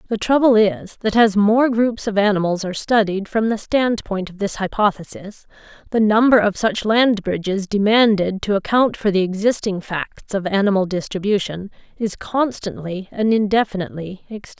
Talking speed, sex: 155 wpm, female